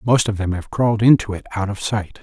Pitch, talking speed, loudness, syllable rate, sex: 105 Hz, 270 wpm, -19 LUFS, 5.9 syllables/s, male